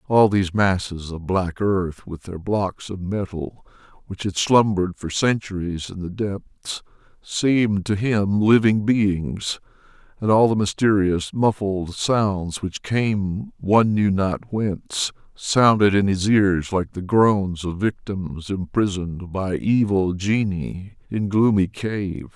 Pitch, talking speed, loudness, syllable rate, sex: 100 Hz, 140 wpm, -21 LUFS, 3.7 syllables/s, male